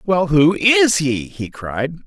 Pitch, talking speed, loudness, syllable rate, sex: 160 Hz, 175 wpm, -16 LUFS, 3.2 syllables/s, male